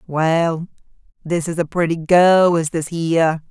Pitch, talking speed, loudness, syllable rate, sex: 165 Hz, 155 wpm, -17 LUFS, 4.0 syllables/s, female